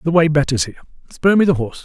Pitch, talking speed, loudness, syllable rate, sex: 155 Hz, 260 wpm, -16 LUFS, 7.9 syllables/s, male